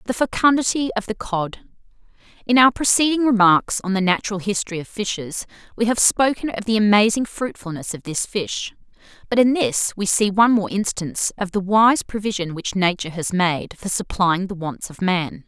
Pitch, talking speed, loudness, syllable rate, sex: 205 Hz, 180 wpm, -20 LUFS, 5.3 syllables/s, female